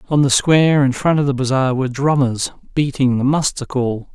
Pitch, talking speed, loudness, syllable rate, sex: 135 Hz, 205 wpm, -17 LUFS, 5.4 syllables/s, male